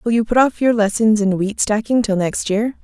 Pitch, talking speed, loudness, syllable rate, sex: 220 Hz, 255 wpm, -17 LUFS, 5.2 syllables/s, female